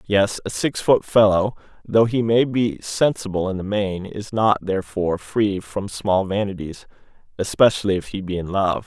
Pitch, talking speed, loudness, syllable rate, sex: 100 Hz, 175 wpm, -21 LUFS, 4.7 syllables/s, male